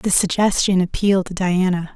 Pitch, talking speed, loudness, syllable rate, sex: 185 Hz, 155 wpm, -18 LUFS, 5.2 syllables/s, female